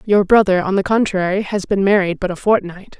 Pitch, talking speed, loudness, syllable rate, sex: 195 Hz, 220 wpm, -16 LUFS, 5.5 syllables/s, female